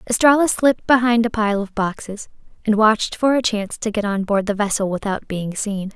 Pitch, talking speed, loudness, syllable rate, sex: 215 Hz, 210 wpm, -19 LUFS, 5.5 syllables/s, female